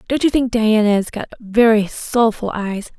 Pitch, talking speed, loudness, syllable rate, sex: 220 Hz, 180 wpm, -17 LUFS, 4.5 syllables/s, female